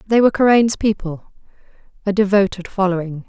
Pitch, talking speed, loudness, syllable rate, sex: 195 Hz, 110 wpm, -17 LUFS, 5.8 syllables/s, female